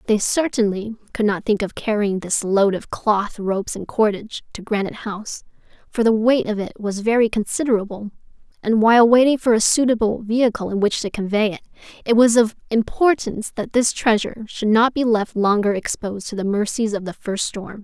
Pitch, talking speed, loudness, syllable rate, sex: 215 Hz, 190 wpm, -19 LUFS, 5.5 syllables/s, female